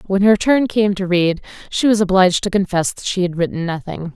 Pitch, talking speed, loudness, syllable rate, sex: 190 Hz, 215 wpm, -17 LUFS, 5.5 syllables/s, female